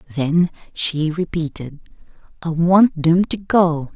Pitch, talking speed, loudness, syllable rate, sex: 165 Hz, 120 wpm, -18 LUFS, 3.7 syllables/s, female